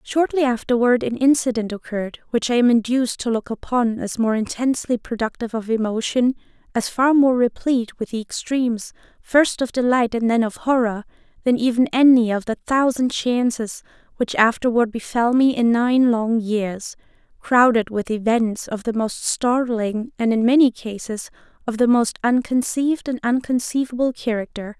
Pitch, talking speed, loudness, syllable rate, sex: 235 Hz, 155 wpm, -20 LUFS, 5.0 syllables/s, female